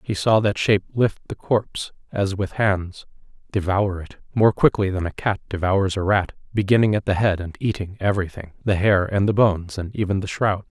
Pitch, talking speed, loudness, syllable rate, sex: 100 Hz, 195 wpm, -21 LUFS, 5.4 syllables/s, male